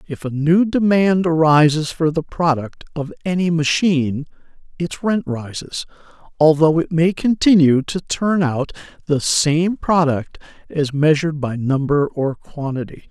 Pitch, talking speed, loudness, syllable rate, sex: 160 Hz, 135 wpm, -18 LUFS, 4.3 syllables/s, male